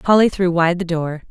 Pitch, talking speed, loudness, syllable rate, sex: 175 Hz, 230 wpm, -17 LUFS, 5.0 syllables/s, female